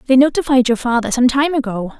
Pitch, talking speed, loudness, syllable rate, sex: 255 Hz, 210 wpm, -15 LUFS, 6.2 syllables/s, female